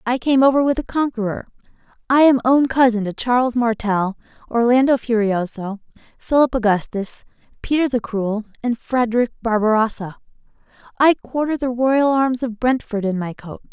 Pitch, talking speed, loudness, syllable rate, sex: 235 Hz, 145 wpm, -18 LUFS, 5.0 syllables/s, female